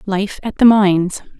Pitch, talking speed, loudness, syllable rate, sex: 200 Hz, 175 wpm, -15 LUFS, 4.6 syllables/s, female